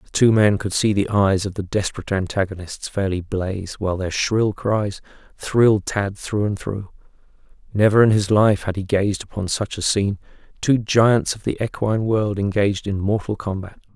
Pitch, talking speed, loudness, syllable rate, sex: 100 Hz, 180 wpm, -20 LUFS, 5.1 syllables/s, male